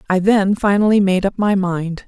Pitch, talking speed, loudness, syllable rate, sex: 195 Hz, 200 wpm, -16 LUFS, 4.8 syllables/s, female